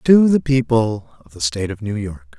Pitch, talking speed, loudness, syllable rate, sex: 110 Hz, 225 wpm, -18 LUFS, 4.7 syllables/s, male